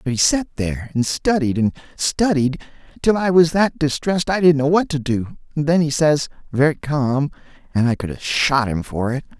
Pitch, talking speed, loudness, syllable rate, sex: 145 Hz, 205 wpm, -19 LUFS, 5.0 syllables/s, male